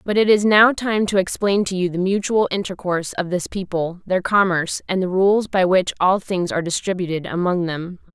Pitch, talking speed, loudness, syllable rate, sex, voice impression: 185 Hz, 205 wpm, -19 LUFS, 5.3 syllables/s, female, feminine, adult-like, slightly powerful, slightly intellectual, slightly calm